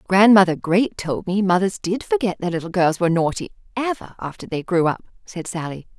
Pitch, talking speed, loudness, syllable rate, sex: 190 Hz, 190 wpm, -20 LUFS, 5.6 syllables/s, female